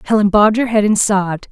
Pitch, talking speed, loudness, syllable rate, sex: 205 Hz, 235 wpm, -14 LUFS, 6.5 syllables/s, female